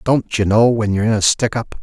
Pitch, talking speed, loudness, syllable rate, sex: 110 Hz, 295 wpm, -16 LUFS, 5.8 syllables/s, male